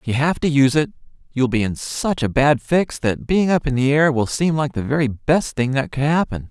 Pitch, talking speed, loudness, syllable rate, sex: 140 Hz, 265 wpm, -19 LUFS, 5.3 syllables/s, male